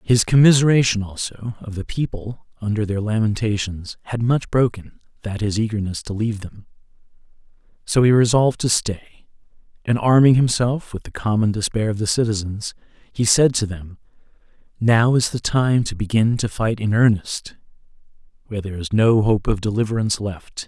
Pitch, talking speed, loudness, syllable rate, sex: 110 Hz, 160 wpm, -19 LUFS, 5.2 syllables/s, male